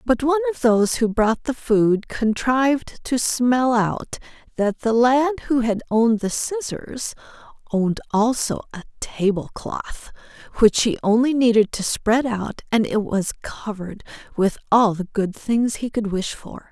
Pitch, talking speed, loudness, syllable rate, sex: 235 Hz, 160 wpm, -21 LUFS, 4.3 syllables/s, female